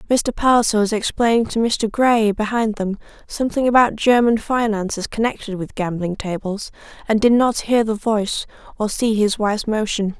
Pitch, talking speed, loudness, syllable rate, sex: 220 Hz, 170 wpm, -19 LUFS, 5.2 syllables/s, female